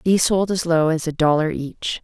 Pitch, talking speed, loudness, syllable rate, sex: 165 Hz, 235 wpm, -19 LUFS, 5.2 syllables/s, female